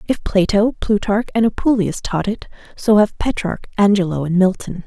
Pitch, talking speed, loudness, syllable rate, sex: 200 Hz, 160 wpm, -17 LUFS, 4.9 syllables/s, female